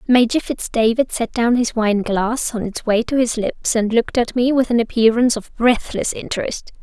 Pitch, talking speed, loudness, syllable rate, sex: 235 Hz, 210 wpm, -18 LUFS, 5.1 syllables/s, female